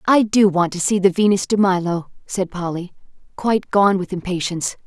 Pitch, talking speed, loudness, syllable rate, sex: 190 Hz, 185 wpm, -19 LUFS, 5.4 syllables/s, female